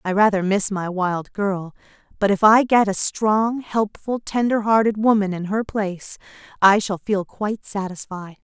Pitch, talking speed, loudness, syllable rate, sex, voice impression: 205 Hz, 160 wpm, -20 LUFS, 4.5 syllables/s, female, feminine, adult-like, tensed, powerful, clear, intellectual, friendly, elegant, lively, slightly strict